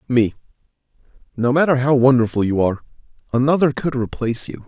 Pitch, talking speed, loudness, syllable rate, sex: 130 Hz, 140 wpm, -18 LUFS, 6.4 syllables/s, male